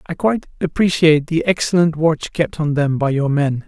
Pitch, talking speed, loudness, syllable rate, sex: 155 Hz, 195 wpm, -17 LUFS, 5.3 syllables/s, male